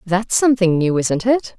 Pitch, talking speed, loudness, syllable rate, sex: 205 Hz, 190 wpm, -17 LUFS, 4.7 syllables/s, female